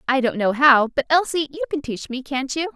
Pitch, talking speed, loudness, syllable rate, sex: 270 Hz, 260 wpm, -20 LUFS, 5.7 syllables/s, female